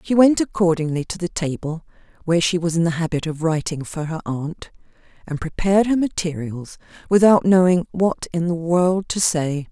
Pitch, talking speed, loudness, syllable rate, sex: 170 Hz, 180 wpm, -20 LUFS, 5.1 syllables/s, female